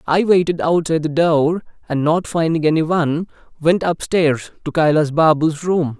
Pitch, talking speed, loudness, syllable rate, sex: 160 Hz, 160 wpm, -17 LUFS, 4.9 syllables/s, male